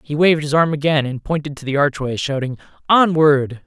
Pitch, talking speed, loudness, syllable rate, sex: 145 Hz, 195 wpm, -17 LUFS, 5.5 syllables/s, male